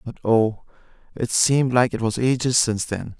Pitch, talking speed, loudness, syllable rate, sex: 120 Hz, 190 wpm, -20 LUFS, 5.2 syllables/s, male